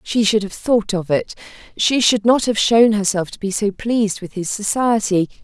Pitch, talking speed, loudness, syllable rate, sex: 210 Hz, 210 wpm, -17 LUFS, 4.8 syllables/s, female